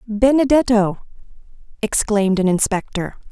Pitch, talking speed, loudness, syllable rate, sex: 215 Hz, 70 wpm, -17 LUFS, 4.7 syllables/s, female